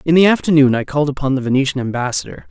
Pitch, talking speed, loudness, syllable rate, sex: 140 Hz, 215 wpm, -16 LUFS, 7.5 syllables/s, male